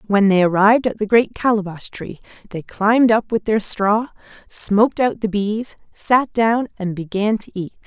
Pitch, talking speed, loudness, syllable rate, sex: 210 Hz, 185 wpm, -18 LUFS, 4.7 syllables/s, female